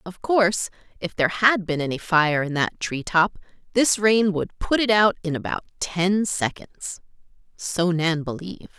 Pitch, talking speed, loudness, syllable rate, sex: 185 Hz, 170 wpm, -22 LUFS, 4.5 syllables/s, female